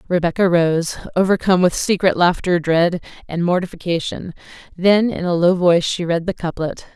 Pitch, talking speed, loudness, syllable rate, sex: 175 Hz, 155 wpm, -18 LUFS, 5.3 syllables/s, female